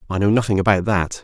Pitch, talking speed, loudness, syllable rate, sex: 100 Hz, 245 wpm, -18 LUFS, 6.8 syllables/s, male